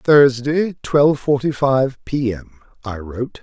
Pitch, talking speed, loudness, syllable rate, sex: 130 Hz, 140 wpm, -18 LUFS, 4.2 syllables/s, male